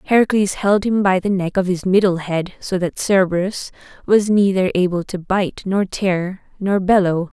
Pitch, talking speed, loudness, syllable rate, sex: 190 Hz, 180 wpm, -18 LUFS, 4.6 syllables/s, female